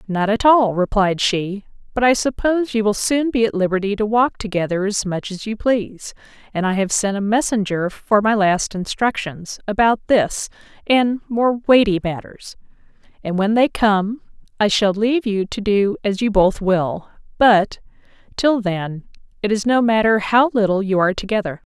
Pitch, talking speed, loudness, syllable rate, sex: 210 Hz, 175 wpm, -18 LUFS, 4.7 syllables/s, female